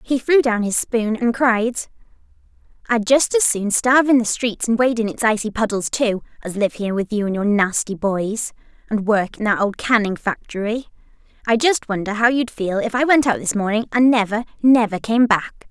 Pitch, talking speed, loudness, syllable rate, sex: 225 Hz, 210 wpm, -18 LUFS, 5.2 syllables/s, female